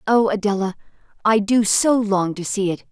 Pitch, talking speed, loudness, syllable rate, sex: 205 Hz, 185 wpm, -19 LUFS, 4.8 syllables/s, female